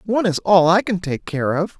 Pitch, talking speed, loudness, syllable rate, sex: 180 Hz, 265 wpm, -18 LUFS, 5.4 syllables/s, male